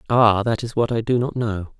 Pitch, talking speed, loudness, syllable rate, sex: 115 Hz, 270 wpm, -20 LUFS, 5.3 syllables/s, male